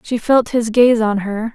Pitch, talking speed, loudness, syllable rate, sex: 230 Hz, 235 wpm, -15 LUFS, 4.1 syllables/s, female